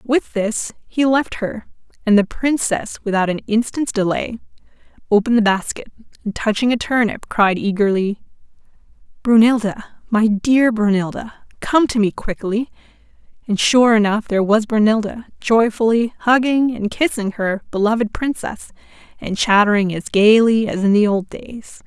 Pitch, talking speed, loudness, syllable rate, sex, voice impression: 220 Hz, 140 wpm, -17 LUFS, 4.7 syllables/s, female, feminine, adult-like, sincere, slightly friendly, elegant, sweet